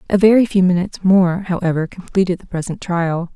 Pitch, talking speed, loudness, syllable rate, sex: 185 Hz, 180 wpm, -17 LUFS, 5.8 syllables/s, female